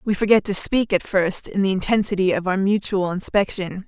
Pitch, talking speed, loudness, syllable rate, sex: 200 Hz, 200 wpm, -20 LUFS, 5.3 syllables/s, female